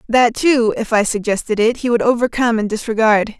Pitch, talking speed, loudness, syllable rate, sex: 225 Hz, 195 wpm, -16 LUFS, 5.6 syllables/s, female